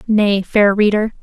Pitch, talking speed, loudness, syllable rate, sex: 205 Hz, 145 wpm, -14 LUFS, 3.9 syllables/s, female